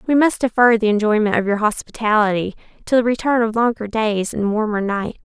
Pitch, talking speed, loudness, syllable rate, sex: 220 Hz, 195 wpm, -18 LUFS, 5.7 syllables/s, female